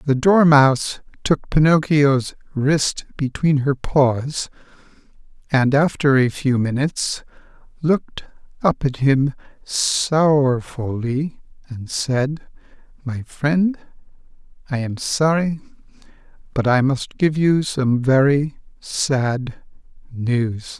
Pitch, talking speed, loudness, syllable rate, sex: 140 Hz, 100 wpm, -19 LUFS, 3.3 syllables/s, male